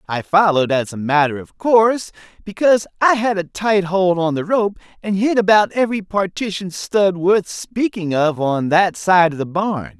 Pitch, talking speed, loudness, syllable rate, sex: 185 Hz, 185 wpm, -17 LUFS, 4.7 syllables/s, male